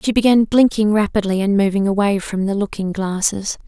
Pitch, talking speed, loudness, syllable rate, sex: 205 Hz, 180 wpm, -17 LUFS, 5.4 syllables/s, female